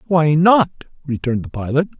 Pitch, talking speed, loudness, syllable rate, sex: 155 Hz, 150 wpm, -17 LUFS, 5.8 syllables/s, male